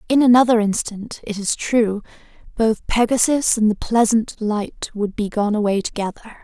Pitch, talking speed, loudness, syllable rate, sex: 220 Hz, 160 wpm, -19 LUFS, 4.7 syllables/s, female